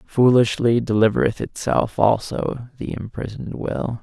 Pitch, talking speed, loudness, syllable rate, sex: 115 Hz, 105 wpm, -20 LUFS, 4.5 syllables/s, male